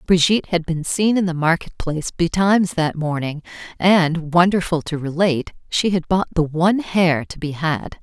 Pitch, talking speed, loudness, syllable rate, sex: 170 Hz, 180 wpm, -19 LUFS, 5.0 syllables/s, female